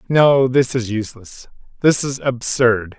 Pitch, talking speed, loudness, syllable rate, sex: 125 Hz, 140 wpm, -17 LUFS, 4.1 syllables/s, male